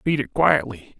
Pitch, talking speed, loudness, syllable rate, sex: 110 Hz, 180 wpm, -20 LUFS, 4.6 syllables/s, male